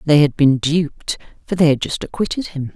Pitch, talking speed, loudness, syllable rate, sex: 155 Hz, 220 wpm, -18 LUFS, 5.5 syllables/s, female